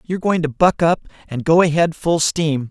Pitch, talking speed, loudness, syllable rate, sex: 160 Hz, 220 wpm, -17 LUFS, 5.2 syllables/s, male